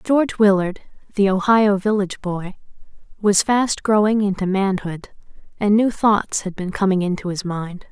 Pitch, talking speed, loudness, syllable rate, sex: 200 Hz, 150 wpm, -19 LUFS, 4.7 syllables/s, female